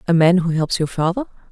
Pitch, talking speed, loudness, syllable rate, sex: 175 Hz, 235 wpm, -18 LUFS, 6.3 syllables/s, female